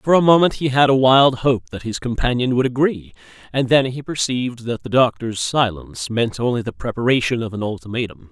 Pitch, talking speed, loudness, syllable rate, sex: 120 Hz, 200 wpm, -18 LUFS, 5.6 syllables/s, male